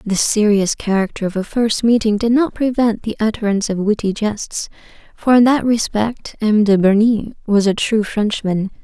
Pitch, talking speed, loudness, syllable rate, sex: 215 Hz, 175 wpm, -16 LUFS, 4.7 syllables/s, female